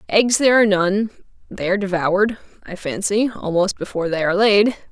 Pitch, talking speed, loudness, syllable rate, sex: 195 Hz, 170 wpm, -18 LUFS, 6.1 syllables/s, female